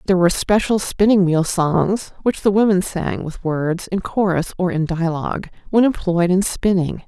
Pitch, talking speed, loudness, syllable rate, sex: 185 Hz, 180 wpm, -18 LUFS, 4.7 syllables/s, female